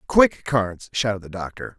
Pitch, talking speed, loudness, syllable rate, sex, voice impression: 115 Hz, 170 wpm, -23 LUFS, 5.0 syllables/s, male, masculine, adult-like, cool, sincere, slightly calm, slightly elegant